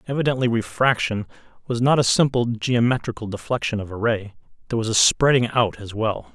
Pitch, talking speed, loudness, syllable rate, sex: 115 Hz, 170 wpm, -21 LUFS, 5.8 syllables/s, male